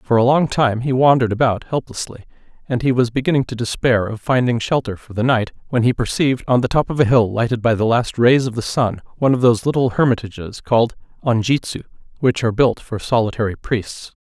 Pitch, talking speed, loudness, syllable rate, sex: 120 Hz, 210 wpm, -18 LUFS, 6.0 syllables/s, male